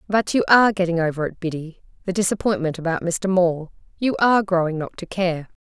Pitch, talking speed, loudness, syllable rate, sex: 180 Hz, 180 wpm, -21 LUFS, 6.1 syllables/s, female